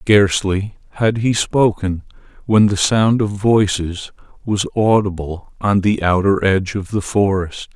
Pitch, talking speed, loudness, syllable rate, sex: 100 Hz, 140 wpm, -17 LUFS, 4.1 syllables/s, male